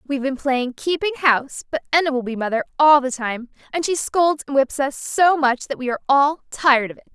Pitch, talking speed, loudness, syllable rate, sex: 275 Hz, 235 wpm, -19 LUFS, 5.8 syllables/s, female